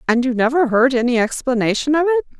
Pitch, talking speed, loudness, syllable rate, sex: 260 Hz, 200 wpm, -17 LUFS, 6.5 syllables/s, female